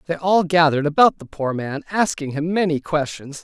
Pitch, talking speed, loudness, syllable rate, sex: 160 Hz, 190 wpm, -19 LUFS, 5.4 syllables/s, male